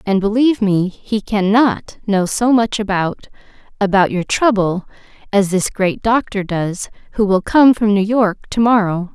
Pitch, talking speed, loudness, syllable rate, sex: 205 Hz, 165 wpm, -16 LUFS, 4.3 syllables/s, female